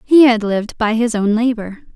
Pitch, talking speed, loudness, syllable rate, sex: 225 Hz, 215 wpm, -15 LUFS, 5.0 syllables/s, female